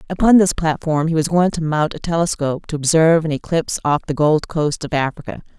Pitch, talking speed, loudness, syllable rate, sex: 160 Hz, 215 wpm, -17 LUFS, 6.0 syllables/s, female